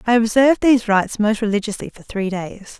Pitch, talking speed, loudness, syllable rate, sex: 220 Hz, 195 wpm, -18 LUFS, 6.1 syllables/s, female